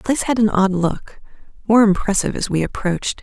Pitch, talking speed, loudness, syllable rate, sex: 200 Hz, 205 wpm, -18 LUFS, 6.3 syllables/s, female